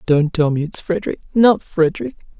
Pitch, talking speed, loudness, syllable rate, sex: 175 Hz, 175 wpm, -17 LUFS, 6.2 syllables/s, female